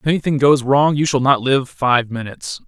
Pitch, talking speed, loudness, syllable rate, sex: 135 Hz, 225 wpm, -16 LUFS, 5.4 syllables/s, male